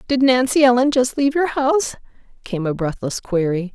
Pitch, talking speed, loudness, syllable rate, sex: 235 Hz, 175 wpm, -18 LUFS, 5.5 syllables/s, female